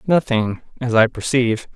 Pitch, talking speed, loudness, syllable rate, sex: 120 Hz, 100 wpm, -19 LUFS, 5.0 syllables/s, male